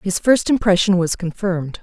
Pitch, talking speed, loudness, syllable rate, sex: 190 Hz, 165 wpm, -17 LUFS, 5.2 syllables/s, female